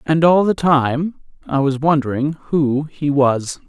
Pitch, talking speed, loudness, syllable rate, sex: 145 Hz, 165 wpm, -17 LUFS, 3.7 syllables/s, male